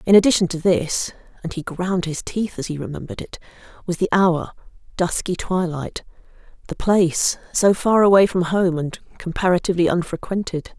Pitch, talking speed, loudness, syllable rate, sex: 180 Hz, 155 wpm, -20 LUFS, 4.3 syllables/s, female